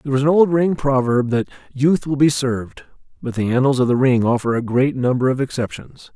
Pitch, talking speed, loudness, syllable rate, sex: 130 Hz, 225 wpm, -18 LUFS, 5.6 syllables/s, male